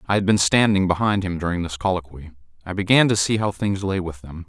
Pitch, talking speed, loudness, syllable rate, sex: 95 Hz, 240 wpm, -20 LUFS, 6.0 syllables/s, male